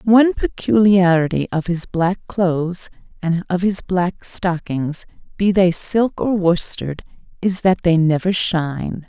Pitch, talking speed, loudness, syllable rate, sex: 180 Hz, 140 wpm, -18 LUFS, 4.0 syllables/s, female